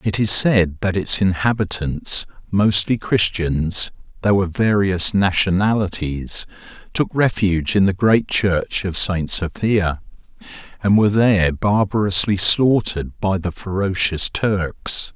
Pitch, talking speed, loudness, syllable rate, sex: 95 Hz, 120 wpm, -18 LUFS, 3.9 syllables/s, male